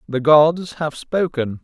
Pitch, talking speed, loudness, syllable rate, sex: 150 Hz, 145 wpm, -17 LUFS, 3.4 syllables/s, male